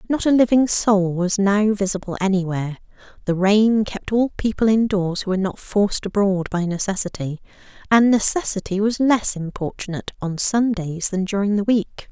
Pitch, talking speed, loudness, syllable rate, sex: 200 Hz, 160 wpm, -20 LUFS, 5.1 syllables/s, female